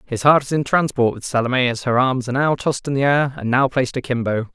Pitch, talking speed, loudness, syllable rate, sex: 130 Hz, 265 wpm, -19 LUFS, 6.4 syllables/s, male